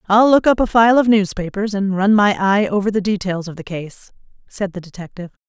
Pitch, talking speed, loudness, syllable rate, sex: 200 Hz, 220 wpm, -16 LUFS, 5.7 syllables/s, female